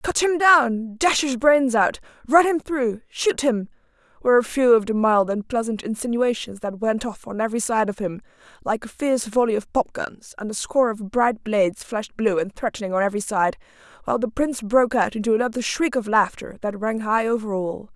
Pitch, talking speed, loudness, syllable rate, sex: 230 Hz, 215 wpm, -22 LUFS, 5.5 syllables/s, female